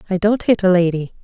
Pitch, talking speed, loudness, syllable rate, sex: 190 Hz, 245 wpm, -16 LUFS, 6.3 syllables/s, female